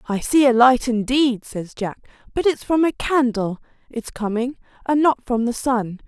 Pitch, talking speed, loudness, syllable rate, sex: 245 Hz, 190 wpm, -20 LUFS, 4.5 syllables/s, female